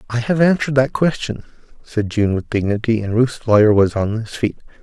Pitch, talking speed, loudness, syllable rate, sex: 115 Hz, 200 wpm, -17 LUFS, 5.7 syllables/s, male